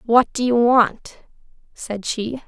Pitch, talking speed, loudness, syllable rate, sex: 235 Hz, 145 wpm, -19 LUFS, 3.2 syllables/s, female